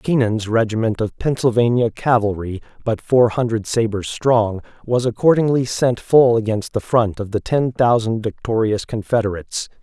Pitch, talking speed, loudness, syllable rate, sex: 115 Hz, 140 wpm, -18 LUFS, 4.8 syllables/s, male